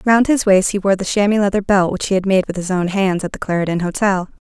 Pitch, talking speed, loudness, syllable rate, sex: 195 Hz, 280 wpm, -17 LUFS, 6.2 syllables/s, female